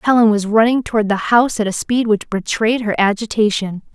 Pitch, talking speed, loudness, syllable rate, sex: 220 Hz, 200 wpm, -16 LUFS, 5.7 syllables/s, female